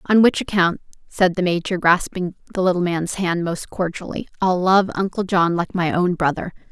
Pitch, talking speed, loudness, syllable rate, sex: 180 Hz, 190 wpm, -20 LUFS, 4.9 syllables/s, female